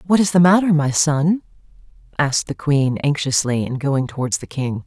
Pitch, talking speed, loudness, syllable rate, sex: 150 Hz, 185 wpm, -18 LUFS, 5.1 syllables/s, female